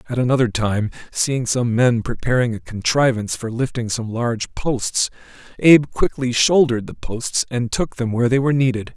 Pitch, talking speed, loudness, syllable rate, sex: 120 Hz, 175 wpm, -19 LUFS, 5.2 syllables/s, male